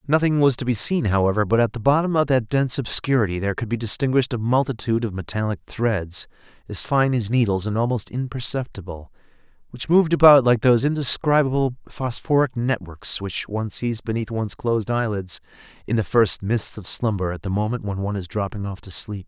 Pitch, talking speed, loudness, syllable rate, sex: 115 Hz, 190 wpm, -21 LUFS, 5.9 syllables/s, male